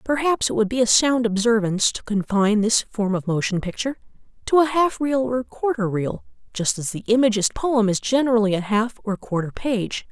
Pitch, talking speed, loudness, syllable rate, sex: 225 Hz, 195 wpm, -21 LUFS, 5.4 syllables/s, female